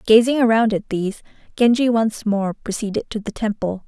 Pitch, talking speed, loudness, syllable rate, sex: 220 Hz, 170 wpm, -19 LUFS, 5.3 syllables/s, female